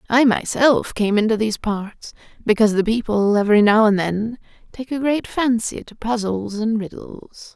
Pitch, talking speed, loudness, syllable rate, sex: 220 Hz, 165 wpm, -19 LUFS, 4.8 syllables/s, female